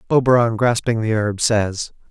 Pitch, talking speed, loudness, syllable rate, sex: 115 Hz, 140 wpm, -18 LUFS, 4.6 syllables/s, male